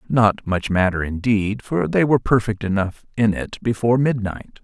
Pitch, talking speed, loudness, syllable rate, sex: 110 Hz, 170 wpm, -20 LUFS, 4.8 syllables/s, male